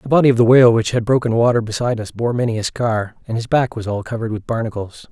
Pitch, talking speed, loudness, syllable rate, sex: 115 Hz, 270 wpm, -17 LUFS, 6.9 syllables/s, male